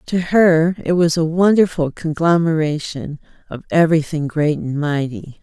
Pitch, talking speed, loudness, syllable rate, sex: 160 Hz, 135 wpm, -17 LUFS, 4.5 syllables/s, female